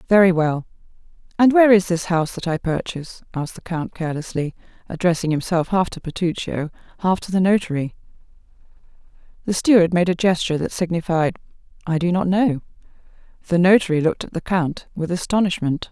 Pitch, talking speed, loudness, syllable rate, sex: 175 Hz, 160 wpm, -20 LUFS, 6.1 syllables/s, female